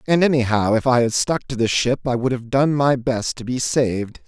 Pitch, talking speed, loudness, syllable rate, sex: 125 Hz, 255 wpm, -19 LUFS, 5.1 syllables/s, male